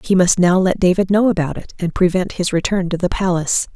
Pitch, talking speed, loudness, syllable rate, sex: 180 Hz, 240 wpm, -17 LUFS, 5.9 syllables/s, female